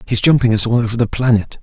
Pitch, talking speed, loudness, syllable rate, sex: 115 Hz, 260 wpm, -15 LUFS, 6.7 syllables/s, male